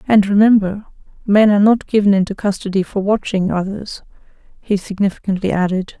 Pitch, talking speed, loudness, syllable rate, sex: 200 Hz, 140 wpm, -16 LUFS, 5.8 syllables/s, female